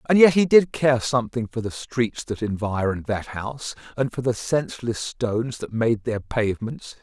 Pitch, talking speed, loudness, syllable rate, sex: 120 Hz, 190 wpm, -23 LUFS, 5.0 syllables/s, male